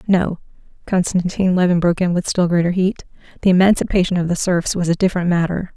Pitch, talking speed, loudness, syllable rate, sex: 180 Hz, 190 wpm, -17 LUFS, 6.3 syllables/s, female